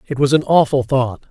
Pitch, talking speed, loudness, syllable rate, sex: 135 Hz, 230 wpm, -16 LUFS, 5.6 syllables/s, male